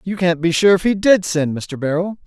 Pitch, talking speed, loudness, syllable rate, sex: 175 Hz, 265 wpm, -17 LUFS, 5.2 syllables/s, male